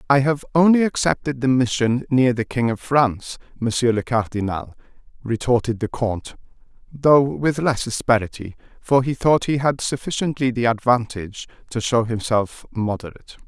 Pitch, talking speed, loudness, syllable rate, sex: 125 Hz, 145 wpm, -20 LUFS, 5.0 syllables/s, male